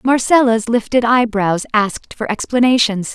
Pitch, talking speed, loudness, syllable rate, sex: 230 Hz, 115 wpm, -15 LUFS, 4.7 syllables/s, female